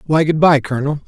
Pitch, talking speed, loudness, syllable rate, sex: 150 Hz, 225 wpm, -15 LUFS, 6.8 syllables/s, male